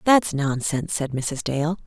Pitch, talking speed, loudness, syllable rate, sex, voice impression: 150 Hz, 160 wpm, -23 LUFS, 4.2 syllables/s, female, very feminine, adult-like, slightly middle-aged, slightly thin, tensed, slightly weak, slightly bright, soft, clear, fluent, slightly cool, intellectual, very refreshing, sincere, very calm, friendly, very reassuring, very elegant, sweet, slightly lively, very kind, slightly intense, slightly modest